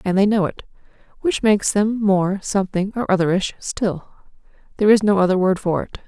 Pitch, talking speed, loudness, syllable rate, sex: 195 Hz, 170 wpm, -19 LUFS, 5.7 syllables/s, female